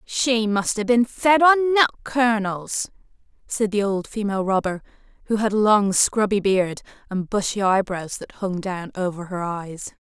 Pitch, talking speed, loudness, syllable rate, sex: 205 Hz, 165 wpm, -21 LUFS, 4.3 syllables/s, female